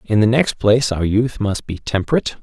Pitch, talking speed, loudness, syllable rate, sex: 110 Hz, 220 wpm, -18 LUFS, 5.7 syllables/s, male